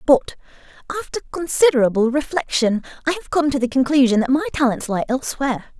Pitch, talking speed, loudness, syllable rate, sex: 275 Hz, 155 wpm, -19 LUFS, 6.3 syllables/s, female